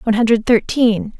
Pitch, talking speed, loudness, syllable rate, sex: 220 Hz, 150 wpm, -15 LUFS, 5.6 syllables/s, female